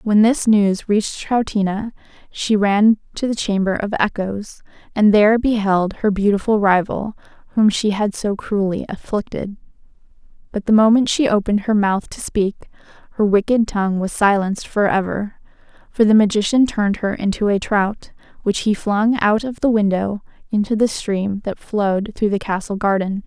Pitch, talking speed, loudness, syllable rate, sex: 205 Hz, 165 wpm, -18 LUFS, 4.9 syllables/s, female